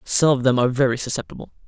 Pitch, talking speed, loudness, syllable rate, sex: 130 Hz, 215 wpm, -19 LUFS, 7.5 syllables/s, male